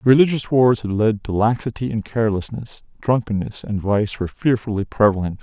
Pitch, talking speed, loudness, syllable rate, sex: 110 Hz, 165 wpm, -20 LUFS, 5.6 syllables/s, male